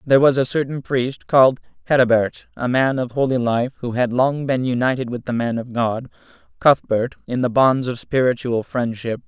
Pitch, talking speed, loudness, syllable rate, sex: 125 Hz, 190 wpm, -19 LUFS, 5.1 syllables/s, male